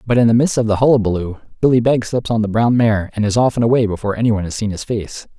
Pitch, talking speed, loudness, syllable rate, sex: 110 Hz, 280 wpm, -16 LUFS, 6.9 syllables/s, male